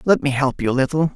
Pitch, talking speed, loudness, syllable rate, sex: 140 Hz, 310 wpm, -19 LUFS, 6.7 syllables/s, male